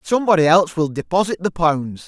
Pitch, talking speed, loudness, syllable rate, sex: 170 Hz, 175 wpm, -17 LUFS, 6.2 syllables/s, male